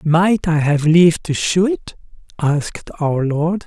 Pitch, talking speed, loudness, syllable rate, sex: 165 Hz, 165 wpm, -16 LUFS, 3.9 syllables/s, male